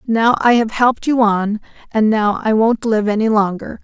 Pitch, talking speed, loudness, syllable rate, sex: 220 Hz, 205 wpm, -15 LUFS, 4.7 syllables/s, female